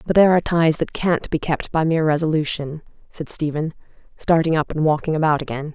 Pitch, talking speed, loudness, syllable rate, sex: 155 Hz, 200 wpm, -20 LUFS, 6.1 syllables/s, female